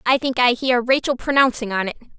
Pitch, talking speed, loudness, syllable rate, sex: 245 Hz, 220 wpm, -19 LUFS, 5.9 syllables/s, female